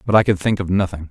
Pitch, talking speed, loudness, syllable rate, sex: 95 Hz, 325 wpm, -18 LUFS, 7.1 syllables/s, male